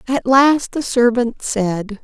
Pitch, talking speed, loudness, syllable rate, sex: 240 Hz, 145 wpm, -16 LUFS, 3.2 syllables/s, female